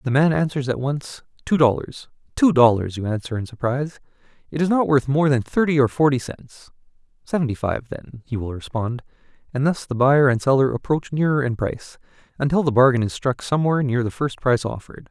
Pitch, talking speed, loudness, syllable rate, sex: 135 Hz, 200 wpm, -21 LUFS, 5.9 syllables/s, male